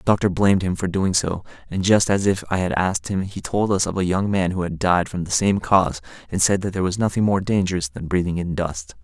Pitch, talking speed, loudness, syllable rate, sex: 90 Hz, 270 wpm, -21 LUFS, 6.0 syllables/s, male